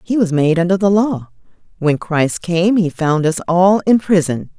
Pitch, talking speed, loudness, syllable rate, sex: 175 Hz, 195 wpm, -15 LUFS, 4.4 syllables/s, female